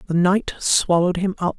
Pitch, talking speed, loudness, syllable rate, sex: 180 Hz, 190 wpm, -19 LUFS, 5.2 syllables/s, female